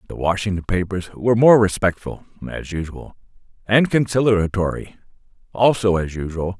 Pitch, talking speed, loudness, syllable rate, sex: 100 Hz, 110 wpm, -19 LUFS, 5.1 syllables/s, male